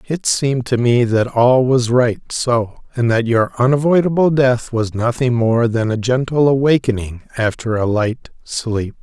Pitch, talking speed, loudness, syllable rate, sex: 120 Hz, 165 wpm, -16 LUFS, 4.4 syllables/s, male